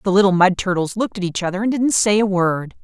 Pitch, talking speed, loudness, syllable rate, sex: 195 Hz, 275 wpm, -18 LUFS, 6.3 syllables/s, female